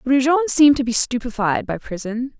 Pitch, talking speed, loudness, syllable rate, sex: 245 Hz, 175 wpm, -18 LUFS, 5.8 syllables/s, female